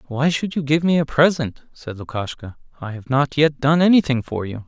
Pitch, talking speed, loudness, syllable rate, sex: 140 Hz, 220 wpm, -19 LUFS, 5.3 syllables/s, male